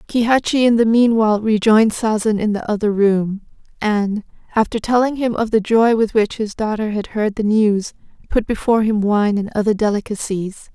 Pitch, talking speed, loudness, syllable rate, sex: 215 Hz, 180 wpm, -17 LUFS, 5.2 syllables/s, female